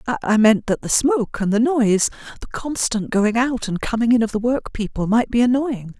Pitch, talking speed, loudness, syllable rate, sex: 230 Hz, 210 wpm, -19 LUFS, 5.1 syllables/s, female